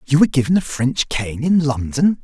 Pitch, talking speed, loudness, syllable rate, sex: 140 Hz, 215 wpm, -18 LUFS, 5.3 syllables/s, male